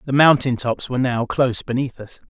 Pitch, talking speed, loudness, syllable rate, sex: 125 Hz, 210 wpm, -19 LUFS, 5.9 syllables/s, male